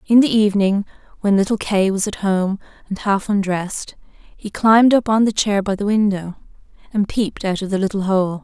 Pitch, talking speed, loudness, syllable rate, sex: 200 Hz, 200 wpm, -18 LUFS, 5.3 syllables/s, female